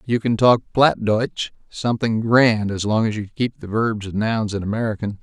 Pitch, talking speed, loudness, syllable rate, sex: 110 Hz, 195 wpm, -20 LUFS, 4.9 syllables/s, male